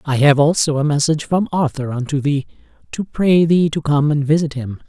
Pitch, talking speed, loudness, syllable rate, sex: 150 Hz, 210 wpm, -17 LUFS, 5.4 syllables/s, male